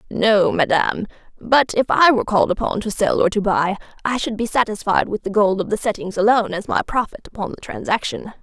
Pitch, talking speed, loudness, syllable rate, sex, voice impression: 210 Hz, 215 wpm, -19 LUFS, 5.9 syllables/s, female, very feminine, slightly adult-like, very thin, very tensed, powerful, very bright, slightly hard, very clear, very fluent, raspy, cool, intellectual, very refreshing, slightly sincere, slightly calm, slightly friendly, slightly reassuring, very unique, slightly elegant, wild, slightly sweet, very lively, very strict, very intense, sharp, light